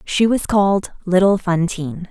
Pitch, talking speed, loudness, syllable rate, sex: 190 Hz, 145 wpm, -17 LUFS, 5.1 syllables/s, female